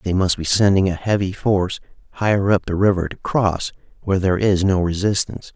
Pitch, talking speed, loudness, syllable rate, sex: 95 Hz, 195 wpm, -19 LUFS, 5.9 syllables/s, male